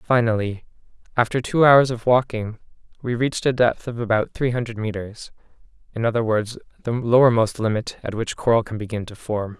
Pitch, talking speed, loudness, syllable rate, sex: 115 Hz, 175 wpm, -21 LUFS, 5.4 syllables/s, male